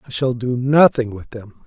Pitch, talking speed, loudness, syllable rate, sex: 125 Hz, 215 wpm, -17 LUFS, 4.6 syllables/s, male